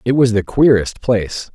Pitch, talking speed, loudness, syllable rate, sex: 115 Hz, 195 wpm, -15 LUFS, 4.9 syllables/s, male